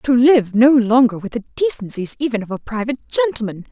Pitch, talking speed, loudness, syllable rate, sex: 240 Hz, 195 wpm, -17 LUFS, 6.3 syllables/s, female